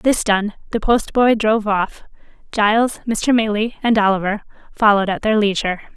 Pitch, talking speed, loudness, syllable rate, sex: 215 Hz, 150 wpm, -17 LUFS, 5.3 syllables/s, female